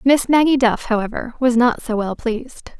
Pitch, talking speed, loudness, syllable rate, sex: 240 Hz, 195 wpm, -18 LUFS, 5.2 syllables/s, female